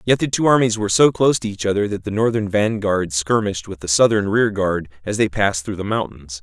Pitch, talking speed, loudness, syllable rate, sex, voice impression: 105 Hz, 235 wpm, -19 LUFS, 6.0 syllables/s, male, masculine, adult-like, tensed, powerful, clear, fluent, cool, intellectual, slightly mature, wild, lively, strict, sharp